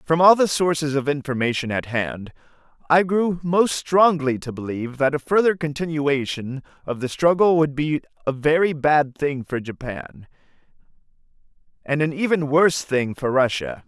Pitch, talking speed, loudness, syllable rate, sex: 150 Hz, 155 wpm, -21 LUFS, 4.8 syllables/s, male